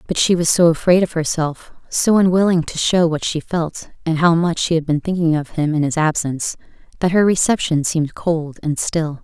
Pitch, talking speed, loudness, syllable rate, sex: 165 Hz, 215 wpm, -17 LUFS, 5.2 syllables/s, female